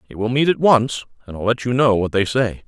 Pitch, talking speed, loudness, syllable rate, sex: 120 Hz, 290 wpm, -18 LUFS, 5.7 syllables/s, male